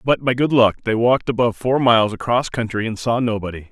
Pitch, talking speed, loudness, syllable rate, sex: 115 Hz, 225 wpm, -18 LUFS, 6.4 syllables/s, male